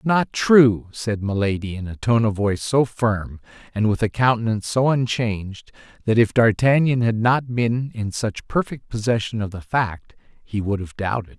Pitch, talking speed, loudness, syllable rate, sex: 110 Hz, 190 wpm, -21 LUFS, 5.0 syllables/s, male